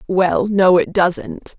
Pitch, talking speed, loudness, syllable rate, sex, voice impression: 185 Hz, 150 wpm, -16 LUFS, 2.8 syllables/s, female, feminine, adult-like, tensed, powerful, clear, fluent, intellectual, elegant, lively, slightly strict, slightly sharp